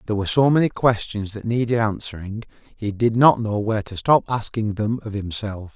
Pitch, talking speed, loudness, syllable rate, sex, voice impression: 110 Hz, 200 wpm, -21 LUFS, 5.4 syllables/s, male, very masculine, very middle-aged, thick, tensed, very powerful, bright, hard, very clear, very fluent, slightly raspy, cool, very intellectual, very refreshing, sincere, slightly calm, mature, very friendly, very reassuring, very unique, slightly elegant, wild, slightly sweet, very lively, slightly kind, intense